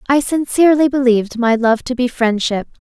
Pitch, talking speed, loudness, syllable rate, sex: 250 Hz, 165 wpm, -15 LUFS, 5.5 syllables/s, female